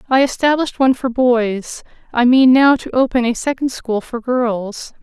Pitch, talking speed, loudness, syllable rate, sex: 250 Hz, 180 wpm, -16 LUFS, 4.8 syllables/s, female